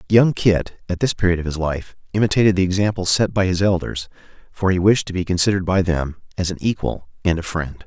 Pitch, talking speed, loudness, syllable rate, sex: 90 Hz, 220 wpm, -20 LUFS, 6.0 syllables/s, male